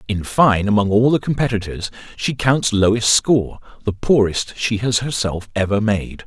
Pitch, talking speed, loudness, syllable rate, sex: 110 Hz, 155 wpm, -18 LUFS, 4.7 syllables/s, male